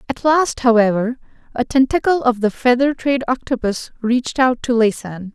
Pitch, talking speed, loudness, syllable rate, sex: 245 Hz, 155 wpm, -17 LUFS, 5.1 syllables/s, female